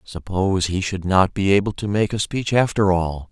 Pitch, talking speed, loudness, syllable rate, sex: 95 Hz, 215 wpm, -20 LUFS, 5.0 syllables/s, male